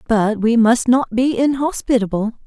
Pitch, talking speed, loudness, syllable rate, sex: 240 Hz, 145 wpm, -16 LUFS, 4.4 syllables/s, female